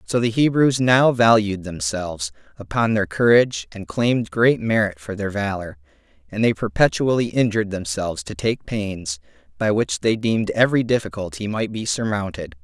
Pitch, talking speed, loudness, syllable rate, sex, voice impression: 105 Hz, 155 wpm, -20 LUFS, 5.1 syllables/s, male, masculine, adult-like, slightly bright, clear, slightly halting, slightly raspy, slightly sincere, slightly mature, friendly, unique, slightly lively, modest